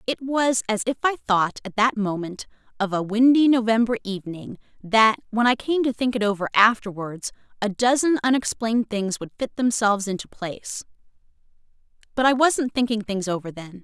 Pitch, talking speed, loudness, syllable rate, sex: 220 Hz, 170 wpm, -22 LUFS, 5.3 syllables/s, female